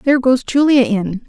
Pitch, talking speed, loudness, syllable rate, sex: 250 Hz, 190 wpm, -14 LUFS, 4.9 syllables/s, female